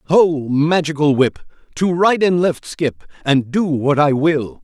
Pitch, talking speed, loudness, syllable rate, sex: 155 Hz, 170 wpm, -16 LUFS, 3.8 syllables/s, male